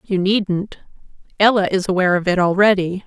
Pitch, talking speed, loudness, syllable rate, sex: 190 Hz, 135 wpm, -17 LUFS, 5.4 syllables/s, female